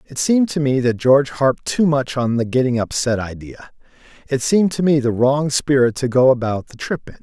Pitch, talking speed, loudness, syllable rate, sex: 135 Hz, 225 wpm, -17 LUFS, 5.5 syllables/s, male